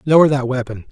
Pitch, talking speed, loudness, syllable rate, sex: 135 Hz, 200 wpm, -16 LUFS, 6.5 syllables/s, male